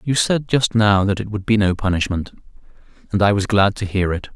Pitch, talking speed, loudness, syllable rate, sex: 105 Hz, 235 wpm, -18 LUFS, 5.4 syllables/s, male